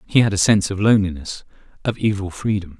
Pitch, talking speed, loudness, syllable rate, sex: 100 Hz, 195 wpm, -19 LUFS, 6.6 syllables/s, male